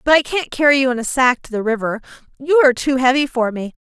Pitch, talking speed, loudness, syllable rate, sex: 260 Hz, 265 wpm, -16 LUFS, 6.4 syllables/s, female